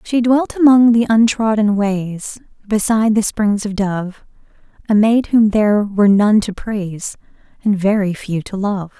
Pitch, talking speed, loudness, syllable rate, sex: 210 Hz, 160 wpm, -15 LUFS, 4.4 syllables/s, female